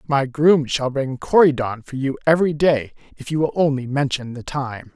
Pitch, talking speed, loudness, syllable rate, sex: 140 Hz, 195 wpm, -19 LUFS, 5.0 syllables/s, male